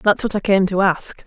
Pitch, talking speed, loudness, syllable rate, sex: 195 Hz, 285 wpm, -18 LUFS, 5.1 syllables/s, female